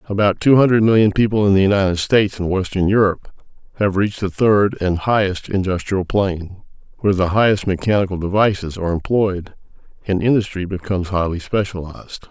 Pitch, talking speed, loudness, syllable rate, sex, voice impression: 100 Hz, 155 wpm, -17 LUFS, 6.0 syllables/s, male, masculine, middle-aged, thick, relaxed, slightly dark, slightly hard, raspy, calm, mature, wild, slightly strict, modest